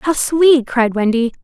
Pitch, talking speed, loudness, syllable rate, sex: 260 Hz, 170 wpm, -14 LUFS, 3.9 syllables/s, female